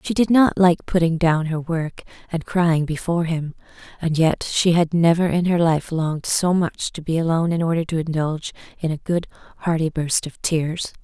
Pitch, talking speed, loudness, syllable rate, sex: 165 Hz, 200 wpm, -20 LUFS, 5.1 syllables/s, female